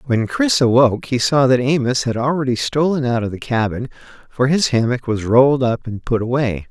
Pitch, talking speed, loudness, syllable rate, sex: 125 Hz, 205 wpm, -17 LUFS, 5.4 syllables/s, male